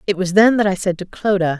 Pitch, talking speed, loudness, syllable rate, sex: 195 Hz, 300 wpm, -17 LUFS, 6.2 syllables/s, female